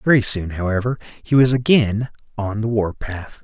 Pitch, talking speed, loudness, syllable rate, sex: 110 Hz, 175 wpm, -19 LUFS, 4.8 syllables/s, male